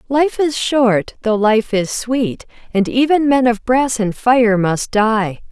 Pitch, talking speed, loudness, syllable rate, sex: 235 Hz, 175 wpm, -15 LUFS, 3.4 syllables/s, female